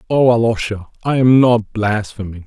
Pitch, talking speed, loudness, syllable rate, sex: 110 Hz, 145 wpm, -15 LUFS, 4.7 syllables/s, male